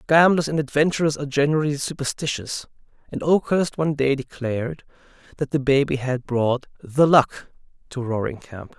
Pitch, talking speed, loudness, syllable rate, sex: 140 Hz, 145 wpm, -22 LUFS, 5.3 syllables/s, male